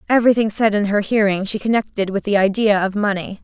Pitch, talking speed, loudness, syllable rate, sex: 210 Hz, 210 wpm, -18 LUFS, 6.2 syllables/s, female